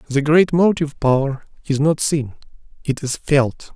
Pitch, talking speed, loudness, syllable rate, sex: 145 Hz, 160 wpm, -18 LUFS, 4.4 syllables/s, male